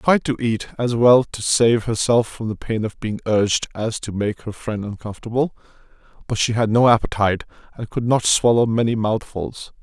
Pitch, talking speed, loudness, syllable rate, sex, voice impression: 110 Hz, 195 wpm, -20 LUFS, 5.2 syllables/s, male, very masculine, very adult-like, slightly old, very thick, tensed, very powerful, bright, slightly hard, clear, fluent, very cool, very intellectual, very sincere, very calm, very mature, very friendly, very reassuring, very unique, elegant, wild, sweet, slightly lively, strict, slightly intense, slightly modest